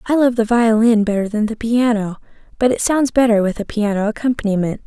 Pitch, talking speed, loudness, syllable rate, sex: 225 Hz, 195 wpm, -17 LUFS, 5.7 syllables/s, female